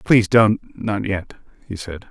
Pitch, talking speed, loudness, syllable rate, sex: 100 Hz, 140 wpm, -19 LUFS, 4.2 syllables/s, male